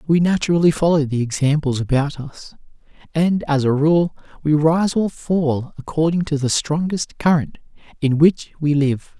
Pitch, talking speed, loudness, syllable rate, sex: 155 Hz, 155 wpm, -19 LUFS, 4.6 syllables/s, male